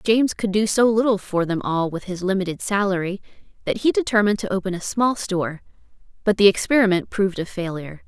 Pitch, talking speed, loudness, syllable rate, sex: 195 Hz, 195 wpm, -21 LUFS, 6.2 syllables/s, female